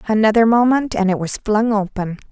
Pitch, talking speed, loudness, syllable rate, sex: 215 Hz, 180 wpm, -17 LUFS, 5.4 syllables/s, female